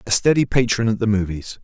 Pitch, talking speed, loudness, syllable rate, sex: 110 Hz, 220 wpm, -19 LUFS, 6.0 syllables/s, male